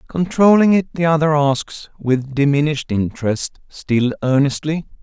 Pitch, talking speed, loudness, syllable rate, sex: 145 Hz, 120 wpm, -17 LUFS, 4.5 syllables/s, male